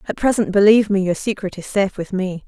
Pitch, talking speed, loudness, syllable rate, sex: 195 Hz, 240 wpm, -18 LUFS, 6.5 syllables/s, female